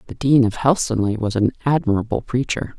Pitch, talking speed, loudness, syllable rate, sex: 120 Hz, 170 wpm, -19 LUFS, 5.6 syllables/s, female